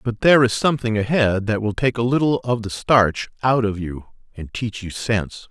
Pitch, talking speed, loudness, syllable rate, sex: 115 Hz, 220 wpm, -20 LUFS, 5.2 syllables/s, male